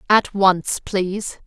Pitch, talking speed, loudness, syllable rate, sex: 195 Hz, 125 wpm, -19 LUFS, 3.2 syllables/s, female